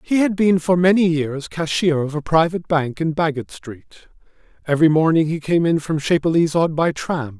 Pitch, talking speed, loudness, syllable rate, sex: 160 Hz, 185 wpm, -18 LUFS, 5.2 syllables/s, male